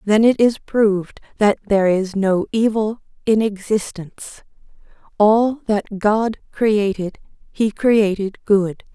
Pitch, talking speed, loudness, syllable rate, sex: 210 Hz, 120 wpm, -18 LUFS, 3.7 syllables/s, female